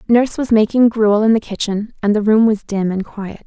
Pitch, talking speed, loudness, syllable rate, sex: 215 Hz, 245 wpm, -15 LUFS, 5.3 syllables/s, female